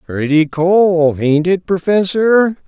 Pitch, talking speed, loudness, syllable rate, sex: 175 Hz, 110 wpm, -13 LUFS, 3.2 syllables/s, male